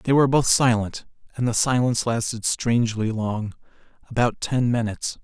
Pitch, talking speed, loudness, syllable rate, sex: 115 Hz, 150 wpm, -22 LUFS, 5.5 syllables/s, male